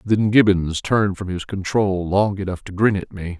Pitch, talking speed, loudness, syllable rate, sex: 95 Hz, 210 wpm, -20 LUFS, 4.9 syllables/s, male